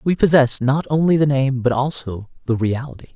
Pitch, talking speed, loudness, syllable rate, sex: 135 Hz, 190 wpm, -18 LUFS, 5.3 syllables/s, male